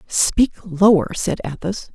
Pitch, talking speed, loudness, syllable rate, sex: 180 Hz, 125 wpm, -18 LUFS, 3.5 syllables/s, female